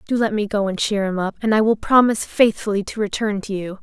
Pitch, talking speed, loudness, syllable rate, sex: 210 Hz, 265 wpm, -19 LUFS, 6.2 syllables/s, female